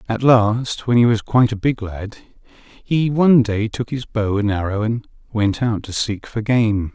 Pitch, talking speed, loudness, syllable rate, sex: 110 Hz, 205 wpm, -18 LUFS, 4.4 syllables/s, male